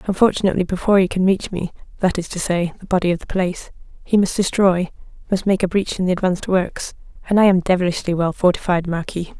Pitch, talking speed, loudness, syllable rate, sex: 185 Hz, 210 wpm, -19 LUFS, 6.7 syllables/s, female